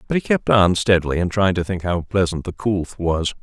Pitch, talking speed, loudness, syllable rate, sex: 95 Hz, 245 wpm, -19 LUFS, 5.3 syllables/s, male